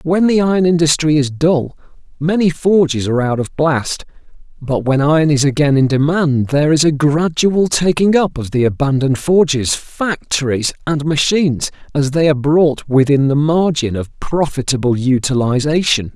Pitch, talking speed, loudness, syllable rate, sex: 150 Hz, 155 wpm, -15 LUFS, 4.9 syllables/s, male